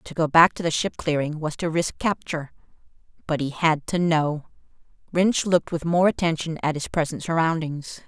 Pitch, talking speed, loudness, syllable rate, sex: 160 Hz, 180 wpm, -23 LUFS, 5.2 syllables/s, female